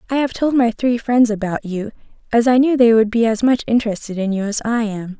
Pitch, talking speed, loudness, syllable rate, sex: 230 Hz, 255 wpm, -17 LUFS, 5.8 syllables/s, female